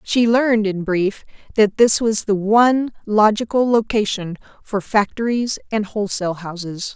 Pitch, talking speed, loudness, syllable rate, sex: 210 Hz, 140 wpm, -18 LUFS, 4.6 syllables/s, female